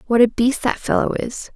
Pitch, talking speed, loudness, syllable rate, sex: 245 Hz, 230 wpm, -19 LUFS, 5.3 syllables/s, female